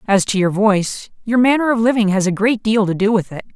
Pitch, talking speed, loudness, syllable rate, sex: 210 Hz, 270 wpm, -16 LUFS, 6.0 syllables/s, female